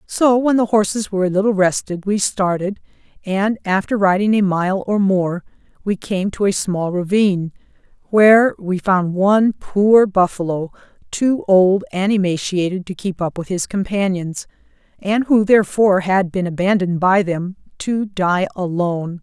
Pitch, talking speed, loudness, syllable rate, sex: 190 Hz, 155 wpm, -17 LUFS, 4.6 syllables/s, female